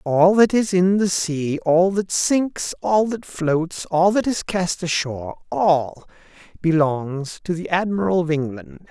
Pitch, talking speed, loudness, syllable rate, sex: 175 Hz, 155 wpm, -20 LUFS, 3.7 syllables/s, male